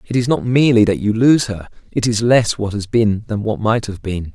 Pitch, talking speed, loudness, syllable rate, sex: 110 Hz, 260 wpm, -16 LUFS, 5.3 syllables/s, male